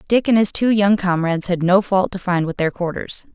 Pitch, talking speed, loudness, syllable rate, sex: 190 Hz, 250 wpm, -18 LUFS, 5.4 syllables/s, female